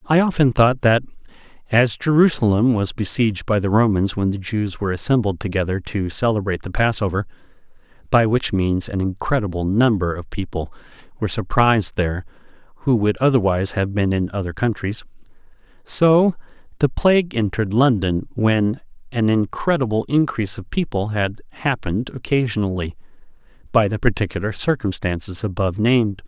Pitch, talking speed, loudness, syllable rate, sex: 110 Hz, 130 wpm, -20 LUFS, 5.5 syllables/s, male